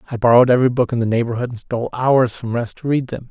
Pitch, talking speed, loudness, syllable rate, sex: 120 Hz, 270 wpm, -17 LUFS, 7.1 syllables/s, male